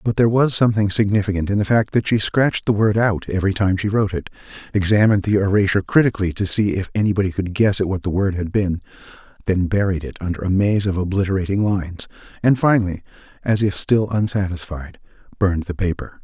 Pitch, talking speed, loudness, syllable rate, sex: 100 Hz, 195 wpm, -19 LUFS, 6.4 syllables/s, male